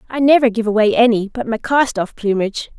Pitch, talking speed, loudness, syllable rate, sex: 230 Hz, 215 wpm, -16 LUFS, 5.9 syllables/s, female